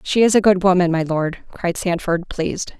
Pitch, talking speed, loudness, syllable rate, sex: 180 Hz, 215 wpm, -18 LUFS, 5.0 syllables/s, female